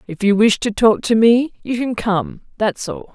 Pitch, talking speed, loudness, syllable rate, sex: 220 Hz, 230 wpm, -17 LUFS, 4.3 syllables/s, female